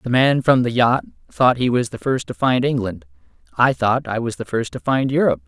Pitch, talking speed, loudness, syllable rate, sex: 125 Hz, 240 wpm, -19 LUFS, 5.4 syllables/s, male